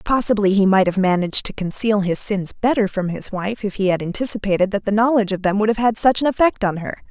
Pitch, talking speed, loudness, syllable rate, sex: 205 Hz, 255 wpm, -18 LUFS, 6.3 syllables/s, female